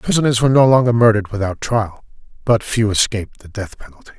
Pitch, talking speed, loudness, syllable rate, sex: 110 Hz, 185 wpm, -15 LUFS, 6.5 syllables/s, male